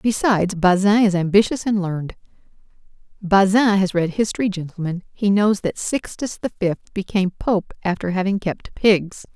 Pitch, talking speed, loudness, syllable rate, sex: 195 Hz, 150 wpm, -20 LUFS, 4.9 syllables/s, female